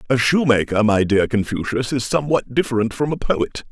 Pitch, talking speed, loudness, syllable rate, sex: 125 Hz, 180 wpm, -19 LUFS, 5.5 syllables/s, male